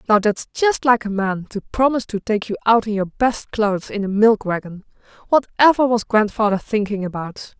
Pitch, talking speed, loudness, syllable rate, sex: 215 Hz, 195 wpm, -19 LUFS, 5.2 syllables/s, female